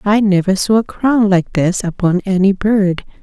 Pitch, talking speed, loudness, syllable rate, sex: 195 Hz, 185 wpm, -14 LUFS, 4.4 syllables/s, female